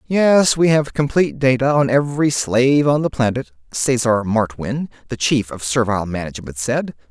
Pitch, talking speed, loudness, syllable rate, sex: 125 Hz, 160 wpm, -18 LUFS, 5.1 syllables/s, male